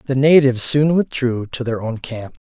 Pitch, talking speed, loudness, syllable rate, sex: 130 Hz, 195 wpm, -17 LUFS, 4.9 syllables/s, male